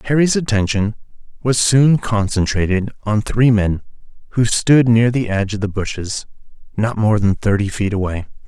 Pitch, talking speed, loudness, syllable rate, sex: 110 Hz, 155 wpm, -17 LUFS, 4.9 syllables/s, male